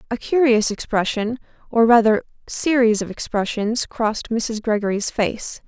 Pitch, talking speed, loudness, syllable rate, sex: 225 Hz, 125 wpm, -20 LUFS, 4.5 syllables/s, female